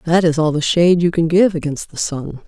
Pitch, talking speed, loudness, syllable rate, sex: 165 Hz, 265 wpm, -16 LUFS, 5.6 syllables/s, female